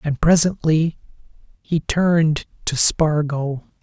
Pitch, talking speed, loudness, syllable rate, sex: 155 Hz, 95 wpm, -19 LUFS, 3.6 syllables/s, male